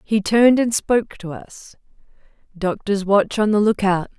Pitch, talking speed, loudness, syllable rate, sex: 205 Hz, 160 wpm, -18 LUFS, 4.6 syllables/s, female